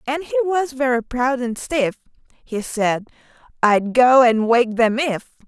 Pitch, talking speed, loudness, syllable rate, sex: 250 Hz, 165 wpm, -18 LUFS, 3.9 syllables/s, female